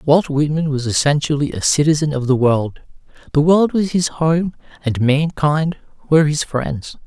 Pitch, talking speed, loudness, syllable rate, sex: 150 Hz, 160 wpm, -17 LUFS, 4.6 syllables/s, male